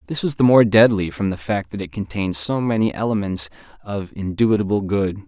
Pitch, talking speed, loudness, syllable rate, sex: 100 Hz, 195 wpm, -20 LUFS, 5.8 syllables/s, male